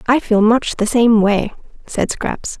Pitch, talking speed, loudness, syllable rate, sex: 225 Hz, 185 wpm, -15 LUFS, 3.8 syllables/s, female